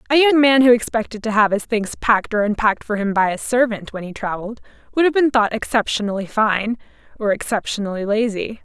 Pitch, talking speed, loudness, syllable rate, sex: 220 Hz, 200 wpm, -18 LUFS, 6.0 syllables/s, female